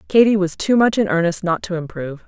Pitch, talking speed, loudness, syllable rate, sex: 185 Hz, 240 wpm, -18 LUFS, 6.2 syllables/s, female